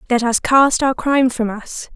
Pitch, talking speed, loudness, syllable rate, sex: 245 Hz, 215 wpm, -16 LUFS, 4.7 syllables/s, female